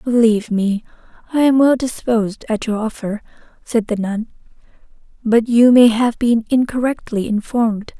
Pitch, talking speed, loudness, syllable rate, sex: 230 Hz, 145 wpm, -17 LUFS, 4.9 syllables/s, female